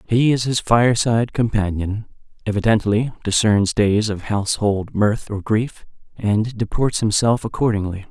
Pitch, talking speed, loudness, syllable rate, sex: 110 Hz, 135 wpm, -19 LUFS, 4.3 syllables/s, male